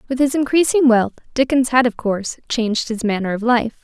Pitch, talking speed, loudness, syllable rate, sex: 240 Hz, 205 wpm, -18 LUFS, 5.7 syllables/s, female